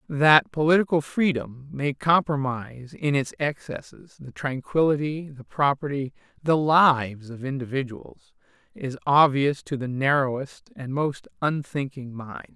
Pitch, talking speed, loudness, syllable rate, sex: 140 Hz, 120 wpm, -24 LUFS, 4.2 syllables/s, male